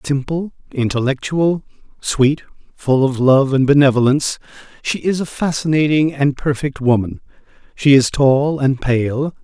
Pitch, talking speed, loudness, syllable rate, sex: 140 Hz, 125 wpm, -16 LUFS, 4.4 syllables/s, male